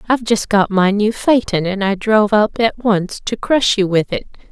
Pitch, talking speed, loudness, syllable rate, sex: 210 Hz, 225 wpm, -16 LUFS, 4.9 syllables/s, female